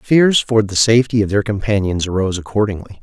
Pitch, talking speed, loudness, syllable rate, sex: 105 Hz, 180 wpm, -16 LUFS, 6.0 syllables/s, male